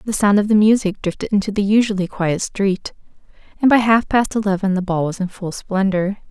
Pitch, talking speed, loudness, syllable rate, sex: 200 Hz, 210 wpm, -18 LUFS, 5.6 syllables/s, female